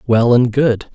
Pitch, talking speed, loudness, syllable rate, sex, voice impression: 120 Hz, 190 wpm, -14 LUFS, 3.8 syllables/s, male, very masculine, very adult-like, thick, slightly relaxed, powerful, slightly dark, soft, muffled, slightly fluent, cool, intellectual, slightly refreshing, very sincere, very calm, slightly mature, friendly, reassuring, unique, very elegant, slightly wild, sweet, slightly lively, kind, modest